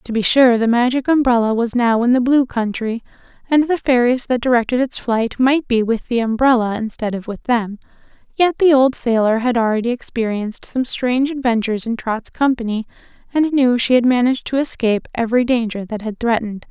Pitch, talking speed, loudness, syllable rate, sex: 240 Hz, 190 wpm, -17 LUFS, 5.6 syllables/s, female